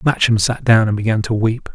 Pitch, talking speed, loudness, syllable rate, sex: 110 Hz, 240 wpm, -16 LUFS, 5.5 syllables/s, male